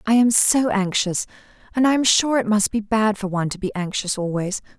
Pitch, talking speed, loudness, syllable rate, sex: 210 Hz, 225 wpm, -20 LUFS, 5.5 syllables/s, female